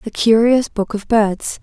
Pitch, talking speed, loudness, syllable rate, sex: 220 Hz, 185 wpm, -16 LUFS, 3.8 syllables/s, female